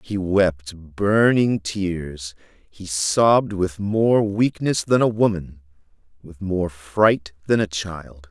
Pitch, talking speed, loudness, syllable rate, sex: 95 Hz, 130 wpm, -20 LUFS, 3.0 syllables/s, male